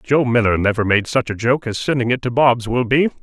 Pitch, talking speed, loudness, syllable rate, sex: 120 Hz, 260 wpm, -17 LUFS, 5.5 syllables/s, male